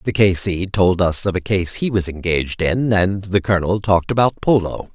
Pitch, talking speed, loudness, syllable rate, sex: 95 Hz, 220 wpm, -18 LUFS, 5.3 syllables/s, male